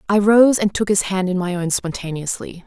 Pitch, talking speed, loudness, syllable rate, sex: 190 Hz, 225 wpm, -18 LUFS, 5.2 syllables/s, female